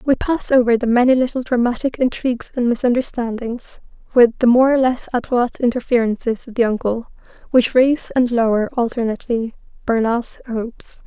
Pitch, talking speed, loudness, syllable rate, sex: 240 Hz, 145 wpm, -18 LUFS, 5.4 syllables/s, female